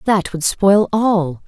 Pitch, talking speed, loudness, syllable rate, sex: 190 Hz, 165 wpm, -16 LUFS, 3.1 syllables/s, female